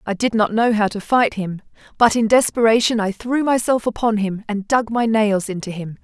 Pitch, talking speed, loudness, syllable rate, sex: 220 Hz, 220 wpm, -18 LUFS, 5.1 syllables/s, female